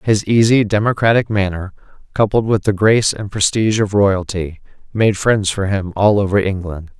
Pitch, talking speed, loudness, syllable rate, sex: 100 Hz, 165 wpm, -16 LUFS, 5.1 syllables/s, male